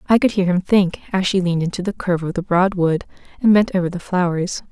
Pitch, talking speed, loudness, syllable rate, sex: 185 Hz, 240 wpm, -19 LUFS, 6.2 syllables/s, female